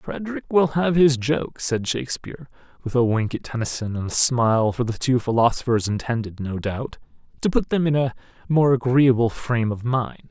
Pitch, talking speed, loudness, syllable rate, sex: 125 Hz, 185 wpm, -22 LUFS, 5.3 syllables/s, male